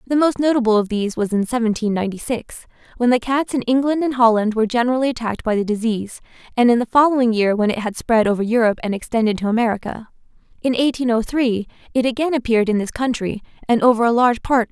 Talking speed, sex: 230 wpm, female